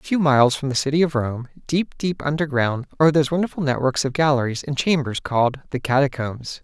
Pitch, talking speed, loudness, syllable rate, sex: 140 Hz, 200 wpm, -21 LUFS, 6.0 syllables/s, male